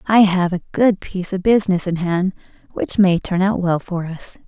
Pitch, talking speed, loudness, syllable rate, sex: 185 Hz, 215 wpm, -18 LUFS, 5.0 syllables/s, female